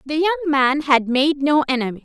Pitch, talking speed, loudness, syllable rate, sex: 285 Hz, 205 wpm, -18 LUFS, 6.0 syllables/s, female